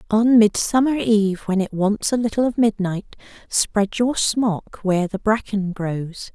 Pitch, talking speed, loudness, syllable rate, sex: 210 Hz, 160 wpm, -20 LUFS, 4.2 syllables/s, female